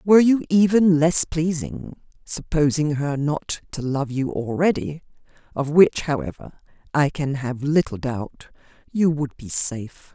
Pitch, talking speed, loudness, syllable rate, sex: 150 Hz, 130 wpm, -21 LUFS, 3.3 syllables/s, female